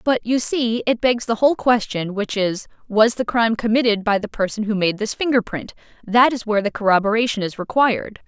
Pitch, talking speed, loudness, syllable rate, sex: 225 Hz, 210 wpm, -19 LUFS, 5.6 syllables/s, female